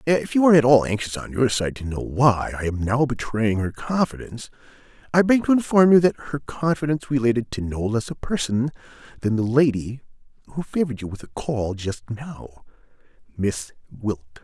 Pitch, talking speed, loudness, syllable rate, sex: 125 Hz, 185 wpm, -22 LUFS, 5.4 syllables/s, male